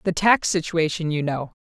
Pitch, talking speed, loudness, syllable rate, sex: 165 Hz, 185 wpm, -21 LUFS, 4.9 syllables/s, female